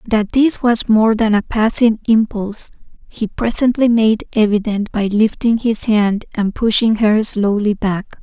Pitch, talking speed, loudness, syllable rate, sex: 220 Hz, 155 wpm, -15 LUFS, 4.2 syllables/s, female